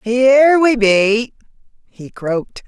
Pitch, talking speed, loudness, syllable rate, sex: 235 Hz, 110 wpm, -13 LUFS, 3.4 syllables/s, female